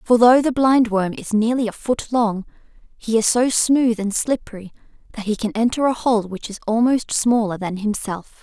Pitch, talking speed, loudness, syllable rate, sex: 225 Hz, 190 wpm, -19 LUFS, 4.8 syllables/s, female